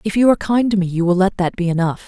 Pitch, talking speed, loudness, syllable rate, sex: 190 Hz, 345 wpm, -17 LUFS, 7.2 syllables/s, female